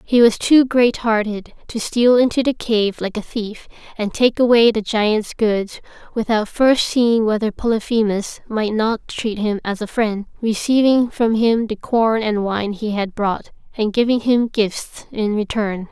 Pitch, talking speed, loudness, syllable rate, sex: 220 Hz, 175 wpm, -18 LUFS, 4.1 syllables/s, female